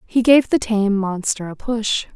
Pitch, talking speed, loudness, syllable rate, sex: 215 Hz, 195 wpm, -18 LUFS, 4.0 syllables/s, female